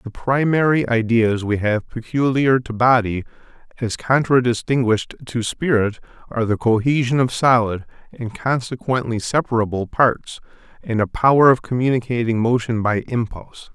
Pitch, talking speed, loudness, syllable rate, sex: 120 Hz, 125 wpm, -19 LUFS, 4.9 syllables/s, male